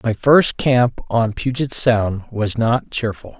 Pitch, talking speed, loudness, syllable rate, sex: 115 Hz, 160 wpm, -18 LUFS, 3.5 syllables/s, male